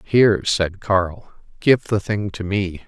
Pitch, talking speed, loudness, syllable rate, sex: 100 Hz, 165 wpm, -20 LUFS, 3.6 syllables/s, male